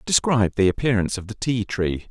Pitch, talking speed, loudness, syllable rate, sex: 110 Hz, 200 wpm, -22 LUFS, 6.2 syllables/s, male